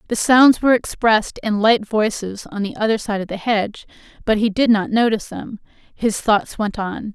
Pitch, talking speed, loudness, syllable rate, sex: 215 Hz, 200 wpm, -18 LUFS, 5.2 syllables/s, female